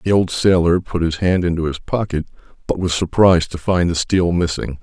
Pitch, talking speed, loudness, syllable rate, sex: 85 Hz, 210 wpm, -17 LUFS, 5.3 syllables/s, male